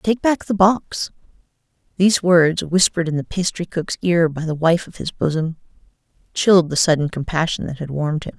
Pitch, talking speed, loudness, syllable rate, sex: 170 Hz, 185 wpm, -19 LUFS, 5.4 syllables/s, female